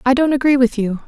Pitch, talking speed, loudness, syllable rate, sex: 255 Hz, 280 wpm, -16 LUFS, 6.5 syllables/s, female